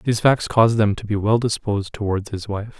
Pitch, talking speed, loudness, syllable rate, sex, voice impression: 110 Hz, 235 wpm, -20 LUFS, 5.8 syllables/s, male, masculine, adult-like, tensed, weak, slightly dark, soft, slightly raspy, cool, intellectual, calm, slightly friendly, reassuring, slightly wild, kind, modest